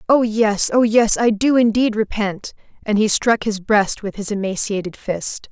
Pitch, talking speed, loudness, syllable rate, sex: 215 Hz, 185 wpm, -18 LUFS, 4.4 syllables/s, female